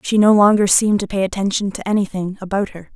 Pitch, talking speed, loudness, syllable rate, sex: 200 Hz, 225 wpm, -17 LUFS, 6.4 syllables/s, female